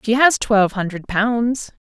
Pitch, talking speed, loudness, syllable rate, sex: 220 Hz, 160 wpm, -18 LUFS, 4.3 syllables/s, female